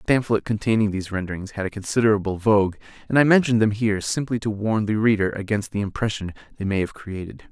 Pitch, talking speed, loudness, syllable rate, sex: 105 Hz, 210 wpm, -22 LUFS, 6.7 syllables/s, male